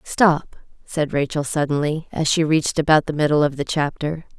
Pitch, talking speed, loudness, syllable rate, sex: 150 Hz, 180 wpm, -20 LUFS, 5.2 syllables/s, female